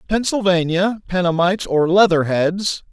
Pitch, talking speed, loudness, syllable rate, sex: 180 Hz, 105 wpm, -17 LUFS, 4.6 syllables/s, male